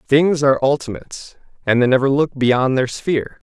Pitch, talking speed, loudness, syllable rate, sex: 135 Hz, 170 wpm, -17 LUFS, 5.3 syllables/s, male